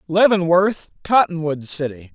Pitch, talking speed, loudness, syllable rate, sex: 170 Hz, 85 wpm, -18 LUFS, 4.4 syllables/s, male